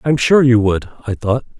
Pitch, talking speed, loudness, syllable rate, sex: 120 Hz, 225 wpm, -15 LUFS, 5.0 syllables/s, male